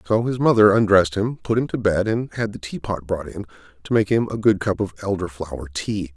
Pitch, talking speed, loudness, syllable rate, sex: 100 Hz, 245 wpm, -21 LUFS, 5.6 syllables/s, male